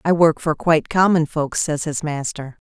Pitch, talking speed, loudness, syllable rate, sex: 155 Hz, 200 wpm, -19 LUFS, 4.8 syllables/s, female